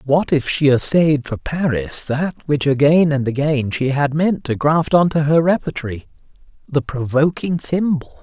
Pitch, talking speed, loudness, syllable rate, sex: 145 Hz, 160 wpm, -17 LUFS, 4.5 syllables/s, male